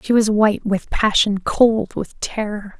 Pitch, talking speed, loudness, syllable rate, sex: 210 Hz, 170 wpm, -18 LUFS, 4.1 syllables/s, female